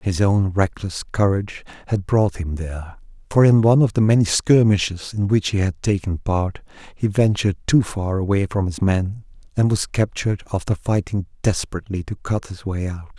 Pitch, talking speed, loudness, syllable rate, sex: 100 Hz, 180 wpm, -20 LUFS, 5.3 syllables/s, male